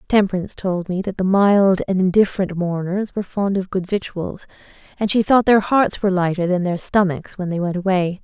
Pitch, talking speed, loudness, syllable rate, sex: 190 Hz, 205 wpm, -19 LUFS, 5.4 syllables/s, female